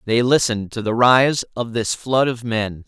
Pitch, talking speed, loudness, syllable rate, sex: 115 Hz, 210 wpm, -18 LUFS, 4.6 syllables/s, male